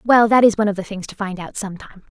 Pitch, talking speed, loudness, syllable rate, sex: 205 Hz, 305 wpm, -18 LUFS, 7.7 syllables/s, female